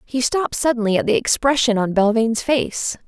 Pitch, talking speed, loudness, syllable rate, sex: 240 Hz, 175 wpm, -18 LUFS, 5.5 syllables/s, female